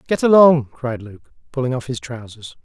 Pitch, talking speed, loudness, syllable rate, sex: 125 Hz, 180 wpm, -17 LUFS, 4.8 syllables/s, male